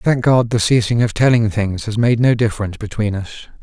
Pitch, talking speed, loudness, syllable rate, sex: 110 Hz, 215 wpm, -16 LUFS, 5.9 syllables/s, male